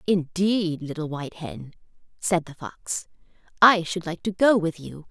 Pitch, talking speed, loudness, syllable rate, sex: 175 Hz, 165 wpm, -24 LUFS, 4.3 syllables/s, female